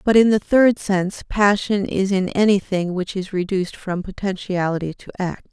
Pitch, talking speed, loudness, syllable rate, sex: 195 Hz, 175 wpm, -20 LUFS, 4.9 syllables/s, female